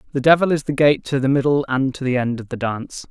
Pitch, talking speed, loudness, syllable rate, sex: 135 Hz, 290 wpm, -19 LUFS, 6.4 syllables/s, male